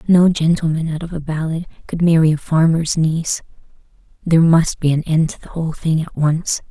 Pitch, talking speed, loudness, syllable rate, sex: 160 Hz, 195 wpm, -17 LUFS, 5.4 syllables/s, female